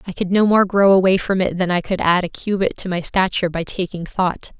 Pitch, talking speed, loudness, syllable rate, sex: 185 Hz, 260 wpm, -18 LUFS, 5.7 syllables/s, female